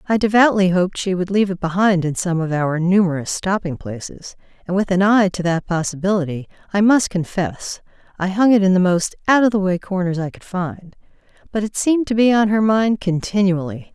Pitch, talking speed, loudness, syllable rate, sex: 190 Hz, 205 wpm, -18 LUFS, 5.5 syllables/s, female